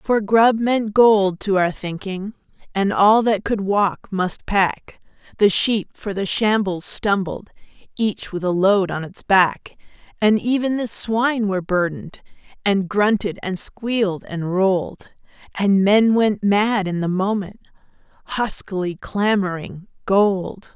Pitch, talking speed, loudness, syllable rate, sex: 200 Hz, 140 wpm, -19 LUFS, 3.8 syllables/s, female